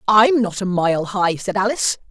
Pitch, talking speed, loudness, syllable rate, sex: 200 Hz, 200 wpm, -18 LUFS, 4.9 syllables/s, male